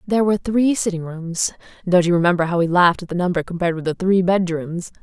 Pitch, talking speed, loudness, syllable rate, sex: 180 Hz, 240 wpm, -19 LUFS, 6.5 syllables/s, female